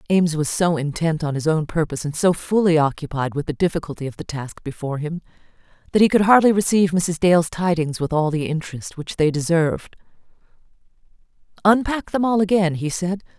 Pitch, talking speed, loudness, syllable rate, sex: 170 Hz, 185 wpm, -20 LUFS, 6.0 syllables/s, female